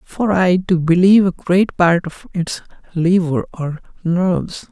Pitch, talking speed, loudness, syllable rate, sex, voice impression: 175 Hz, 155 wpm, -16 LUFS, 4.0 syllables/s, male, masculine, adult-like, relaxed, slightly weak, clear, halting, slightly nasal, intellectual, calm, friendly, reassuring, slightly wild, slightly lively, modest